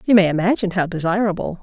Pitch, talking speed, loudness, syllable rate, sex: 190 Hz, 185 wpm, -19 LUFS, 7.3 syllables/s, female